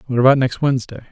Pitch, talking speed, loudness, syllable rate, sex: 130 Hz, 215 wpm, -17 LUFS, 8.5 syllables/s, male